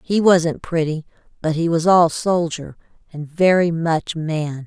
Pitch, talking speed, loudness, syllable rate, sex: 165 Hz, 155 wpm, -18 LUFS, 3.9 syllables/s, female